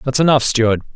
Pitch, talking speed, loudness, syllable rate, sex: 125 Hz, 190 wpm, -15 LUFS, 6.9 syllables/s, male